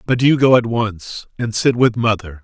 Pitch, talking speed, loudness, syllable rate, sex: 115 Hz, 220 wpm, -16 LUFS, 4.6 syllables/s, male